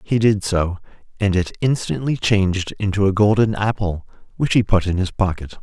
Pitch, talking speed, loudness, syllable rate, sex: 100 Hz, 180 wpm, -19 LUFS, 5.1 syllables/s, male